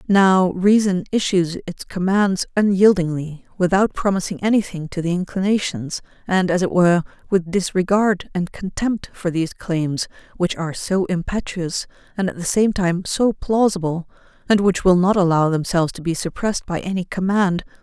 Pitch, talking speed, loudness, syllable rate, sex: 185 Hz, 155 wpm, -20 LUFS, 4.9 syllables/s, female